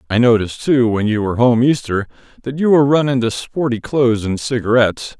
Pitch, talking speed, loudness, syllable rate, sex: 120 Hz, 195 wpm, -16 LUFS, 6.1 syllables/s, male